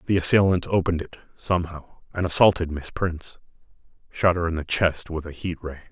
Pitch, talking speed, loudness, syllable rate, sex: 85 Hz, 170 wpm, -23 LUFS, 6.0 syllables/s, male